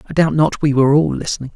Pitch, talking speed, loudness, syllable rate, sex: 145 Hz, 270 wpm, -16 LUFS, 7.0 syllables/s, male